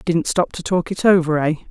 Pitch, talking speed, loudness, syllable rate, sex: 170 Hz, 210 wpm, -18 LUFS, 5.4 syllables/s, female